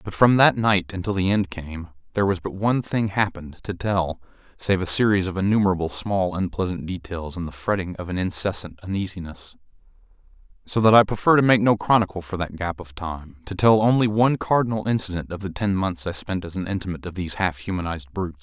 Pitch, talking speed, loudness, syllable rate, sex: 95 Hz, 210 wpm, -22 LUFS, 6.1 syllables/s, male